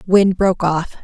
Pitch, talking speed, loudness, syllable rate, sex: 180 Hz, 175 wpm, -16 LUFS, 4.7 syllables/s, female